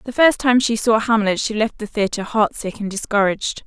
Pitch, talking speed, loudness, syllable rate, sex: 220 Hz, 215 wpm, -19 LUFS, 5.4 syllables/s, female